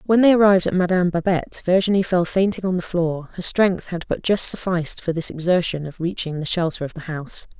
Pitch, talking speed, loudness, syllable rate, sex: 180 Hz, 220 wpm, -20 LUFS, 6.0 syllables/s, female